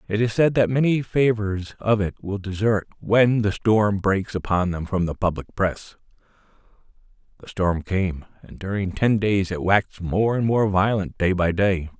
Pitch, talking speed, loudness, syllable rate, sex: 100 Hz, 180 wpm, -22 LUFS, 4.6 syllables/s, male